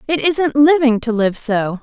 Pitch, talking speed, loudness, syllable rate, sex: 260 Hz, 195 wpm, -15 LUFS, 4.2 syllables/s, female